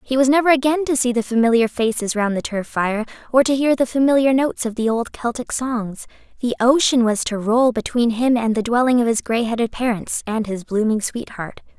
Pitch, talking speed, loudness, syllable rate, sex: 240 Hz, 215 wpm, -19 LUFS, 5.4 syllables/s, female